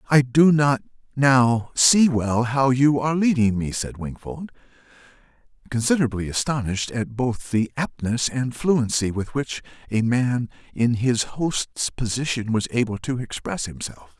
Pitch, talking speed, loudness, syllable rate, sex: 125 Hz, 145 wpm, -22 LUFS, 4.3 syllables/s, male